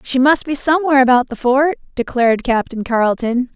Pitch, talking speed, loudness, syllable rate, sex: 260 Hz, 170 wpm, -15 LUFS, 5.9 syllables/s, female